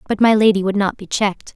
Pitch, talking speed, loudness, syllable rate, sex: 205 Hz, 270 wpm, -17 LUFS, 6.6 syllables/s, female